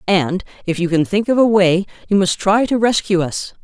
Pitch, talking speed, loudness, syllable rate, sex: 190 Hz, 230 wpm, -16 LUFS, 5.0 syllables/s, female